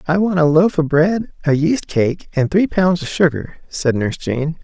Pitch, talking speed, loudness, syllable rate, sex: 160 Hz, 220 wpm, -17 LUFS, 4.6 syllables/s, male